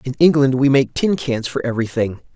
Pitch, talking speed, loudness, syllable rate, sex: 130 Hz, 205 wpm, -17 LUFS, 5.7 syllables/s, male